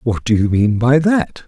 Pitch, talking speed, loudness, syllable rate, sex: 130 Hz, 245 wpm, -15 LUFS, 4.4 syllables/s, male